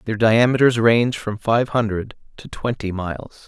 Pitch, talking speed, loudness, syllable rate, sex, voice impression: 110 Hz, 155 wpm, -19 LUFS, 4.8 syllables/s, male, masculine, adult-like, tensed, powerful, slightly hard, clear, fluent, intellectual, slightly calm, slightly wild, lively, slightly strict, slightly sharp